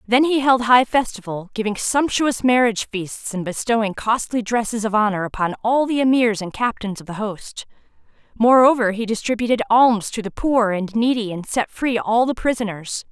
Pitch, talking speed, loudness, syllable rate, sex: 225 Hz, 180 wpm, -19 LUFS, 5.0 syllables/s, female